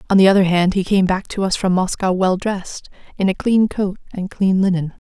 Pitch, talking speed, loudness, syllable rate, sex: 190 Hz, 235 wpm, -18 LUFS, 5.5 syllables/s, female